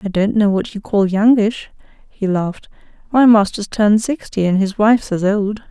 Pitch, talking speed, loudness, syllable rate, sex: 205 Hz, 190 wpm, -16 LUFS, 5.1 syllables/s, female